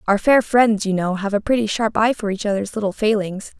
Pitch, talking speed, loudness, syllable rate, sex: 210 Hz, 250 wpm, -19 LUFS, 5.6 syllables/s, female